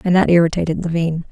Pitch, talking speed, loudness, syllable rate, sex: 170 Hz, 185 wpm, -17 LUFS, 6.8 syllables/s, female